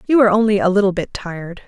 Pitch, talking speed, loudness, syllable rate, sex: 200 Hz, 250 wpm, -16 LUFS, 7.4 syllables/s, female